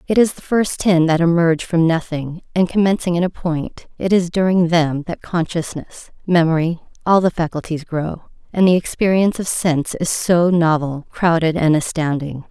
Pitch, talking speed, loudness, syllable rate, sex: 170 Hz, 170 wpm, -18 LUFS, 4.9 syllables/s, female